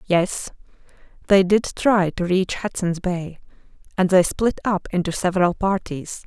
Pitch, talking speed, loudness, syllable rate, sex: 185 Hz, 145 wpm, -21 LUFS, 4.2 syllables/s, female